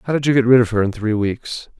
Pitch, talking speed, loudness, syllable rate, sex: 115 Hz, 335 wpm, -17 LUFS, 5.9 syllables/s, male